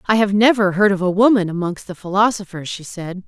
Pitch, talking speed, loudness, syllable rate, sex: 195 Hz, 220 wpm, -17 LUFS, 5.7 syllables/s, female